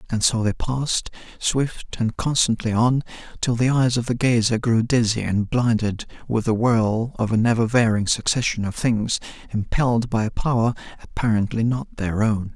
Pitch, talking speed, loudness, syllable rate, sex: 115 Hz, 170 wpm, -21 LUFS, 4.8 syllables/s, male